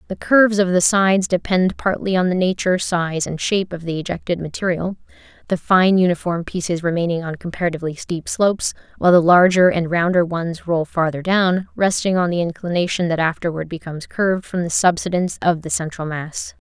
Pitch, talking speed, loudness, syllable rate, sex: 175 Hz, 180 wpm, -19 LUFS, 5.7 syllables/s, female